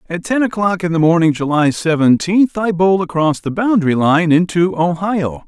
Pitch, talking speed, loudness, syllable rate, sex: 175 Hz, 175 wpm, -15 LUFS, 4.9 syllables/s, male